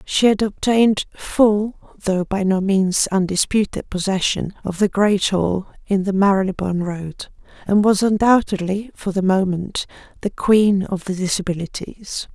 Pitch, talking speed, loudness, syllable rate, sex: 195 Hz, 140 wpm, -19 LUFS, 4.4 syllables/s, female